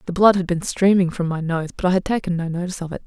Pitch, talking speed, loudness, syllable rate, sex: 180 Hz, 315 wpm, -20 LUFS, 7.1 syllables/s, female